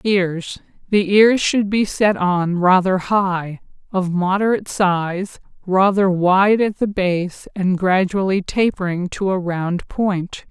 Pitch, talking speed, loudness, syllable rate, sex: 190 Hz, 130 wpm, -18 LUFS, 3.5 syllables/s, female